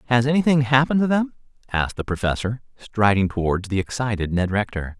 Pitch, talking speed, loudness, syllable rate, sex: 115 Hz, 170 wpm, -21 LUFS, 6.1 syllables/s, male